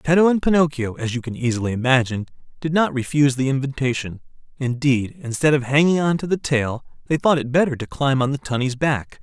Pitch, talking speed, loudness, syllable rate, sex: 140 Hz, 195 wpm, -20 LUFS, 6.1 syllables/s, male